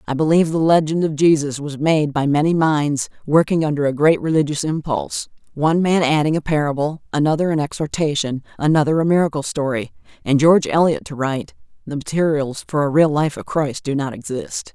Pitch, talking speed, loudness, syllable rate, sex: 150 Hz, 175 wpm, -18 LUFS, 5.7 syllables/s, female